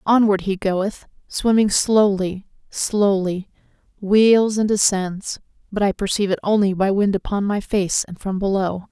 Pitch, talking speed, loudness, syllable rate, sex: 200 Hz, 150 wpm, -19 LUFS, 4.3 syllables/s, female